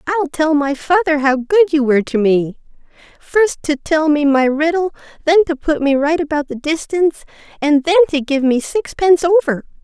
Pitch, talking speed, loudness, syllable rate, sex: 300 Hz, 185 wpm, -15 LUFS, 5.0 syllables/s, female